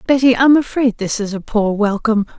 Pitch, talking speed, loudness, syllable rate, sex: 230 Hz, 200 wpm, -15 LUFS, 5.6 syllables/s, female